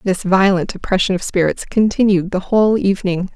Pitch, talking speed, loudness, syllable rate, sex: 190 Hz, 160 wpm, -16 LUFS, 5.6 syllables/s, female